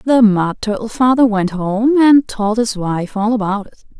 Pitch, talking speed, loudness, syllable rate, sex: 220 Hz, 195 wpm, -15 LUFS, 4.2 syllables/s, female